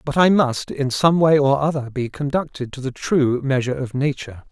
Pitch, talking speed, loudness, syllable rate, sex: 135 Hz, 215 wpm, -19 LUFS, 5.4 syllables/s, male